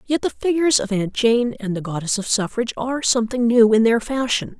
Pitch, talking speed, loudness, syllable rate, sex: 235 Hz, 220 wpm, -19 LUFS, 5.9 syllables/s, female